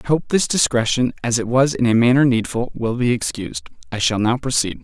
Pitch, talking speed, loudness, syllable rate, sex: 125 Hz, 225 wpm, -18 LUFS, 5.7 syllables/s, male